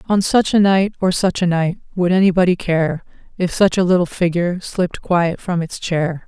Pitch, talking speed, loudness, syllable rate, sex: 180 Hz, 200 wpm, -17 LUFS, 5.0 syllables/s, female